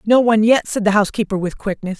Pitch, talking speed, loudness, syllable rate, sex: 210 Hz, 240 wpm, -17 LUFS, 6.8 syllables/s, female